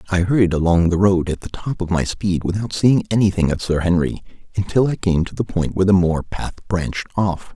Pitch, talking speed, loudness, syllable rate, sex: 90 Hz, 230 wpm, -19 LUFS, 5.7 syllables/s, male